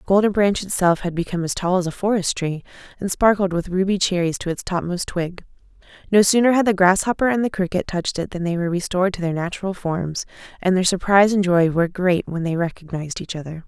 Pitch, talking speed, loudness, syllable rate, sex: 180 Hz, 225 wpm, -20 LUFS, 6.3 syllables/s, female